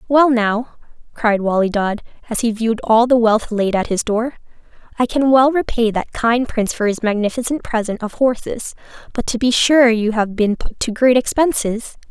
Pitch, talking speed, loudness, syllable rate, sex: 230 Hz, 195 wpm, -17 LUFS, 4.9 syllables/s, female